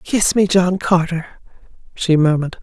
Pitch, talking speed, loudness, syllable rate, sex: 175 Hz, 135 wpm, -16 LUFS, 4.9 syllables/s, female